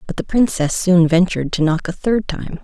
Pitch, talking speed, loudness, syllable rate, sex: 175 Hz, 230 wpm, -17 LUFS, 5.2 syllables/s, female